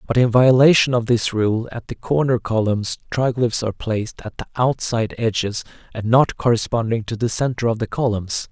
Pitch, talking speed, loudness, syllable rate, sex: 115 Hz, 185 wpm, -19 LUFS, 5.2 syllables/s, male